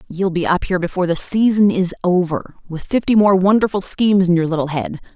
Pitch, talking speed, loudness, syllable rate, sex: 185 Hz, 210 wpm, -17 LUFS, 6.1 syllables/s, female